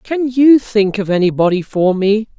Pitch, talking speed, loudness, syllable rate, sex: 215 Hz, 175 wpm, -14 LUFS, 4.5 syllables/s, male